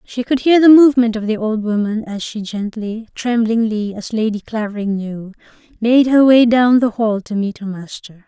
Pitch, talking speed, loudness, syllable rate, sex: 225 Hz, 195 wpm, -15 LUFS, 4.9 syllables/s, female